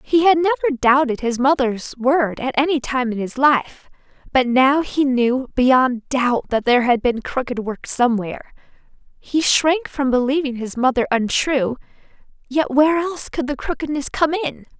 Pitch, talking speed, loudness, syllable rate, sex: 265 Hz, 165 wpm, -18 LUFS, 4.7 syllables/s, female